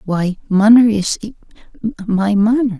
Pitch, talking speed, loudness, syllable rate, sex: 210 Hz, 85 wpm, -15 LUFS, 4.2 syllables/s, male